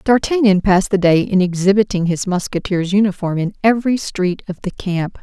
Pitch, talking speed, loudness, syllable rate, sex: 195 Hz, 170 wpm, -16 LUFS, 5.4 syllables/s, female